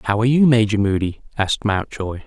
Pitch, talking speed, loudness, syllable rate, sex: 110 Hz, 185 wpm, -19 LUFS, 6.1 syllables/s, male